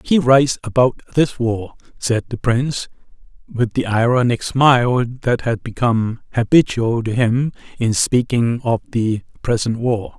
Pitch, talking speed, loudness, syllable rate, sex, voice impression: 120 Hz, 140 wpm, -18 LUFS, 4.4 syllables/s, male, masculine, middle-aged, slightly relaxed, slightly soft, slightly muffled, raspy, sincere, mature, friendly, reassuring, wild, kind, modest